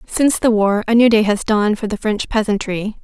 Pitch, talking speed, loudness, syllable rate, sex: 215 Hz, 235 wpm, -16 LUFS, 5.7 syllables/s, female